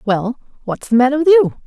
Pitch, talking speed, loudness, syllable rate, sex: 255 Hz, 215 wpm, -14 LUFS, 5.6 syllables/s, female